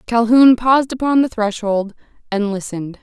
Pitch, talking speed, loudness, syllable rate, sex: 230 Hz, 140 wpm, -16 LUFS, 5.2 syllables/s, female